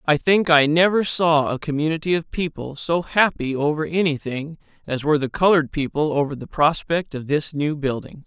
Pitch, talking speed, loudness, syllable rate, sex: 155 Hz, 180 wpm, -21 LUFS, 5.2 syllables/s, male